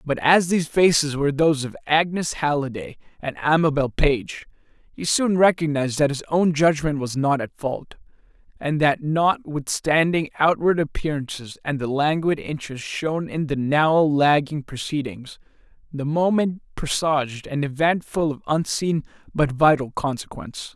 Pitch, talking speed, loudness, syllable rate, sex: 150 Hz, 140 wpm, -22 LUFS, 4.7 syllables/s, male